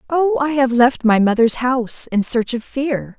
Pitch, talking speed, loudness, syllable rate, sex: 255 Hz, 205 wpm, -17 LUFS, 4.4 syllables/s, female